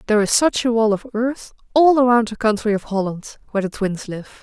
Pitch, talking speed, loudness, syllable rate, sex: 225 Hz, 230 wpm, -19 LUFS, 5.7 syllables/s, female